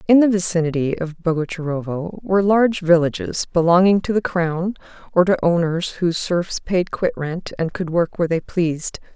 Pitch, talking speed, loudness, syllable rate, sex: 175 Hz, 165 wpm, -19 LUFS, 5.3 syllables/s, female